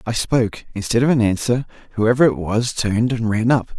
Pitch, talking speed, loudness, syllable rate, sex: 115 Hz, 205 wpm, -19 LUFS, 5.6 syllables/s, male